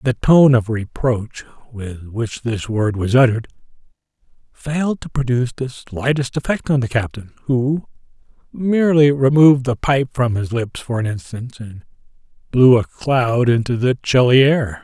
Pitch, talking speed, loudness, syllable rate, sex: 125 Hz, 155 wpm, -17 LUFS, 4.6 syllables/s, male